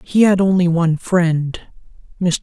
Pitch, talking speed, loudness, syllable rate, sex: 175 Hz, 125 wpm, -16 LUFS, 4.4 syllables/s, male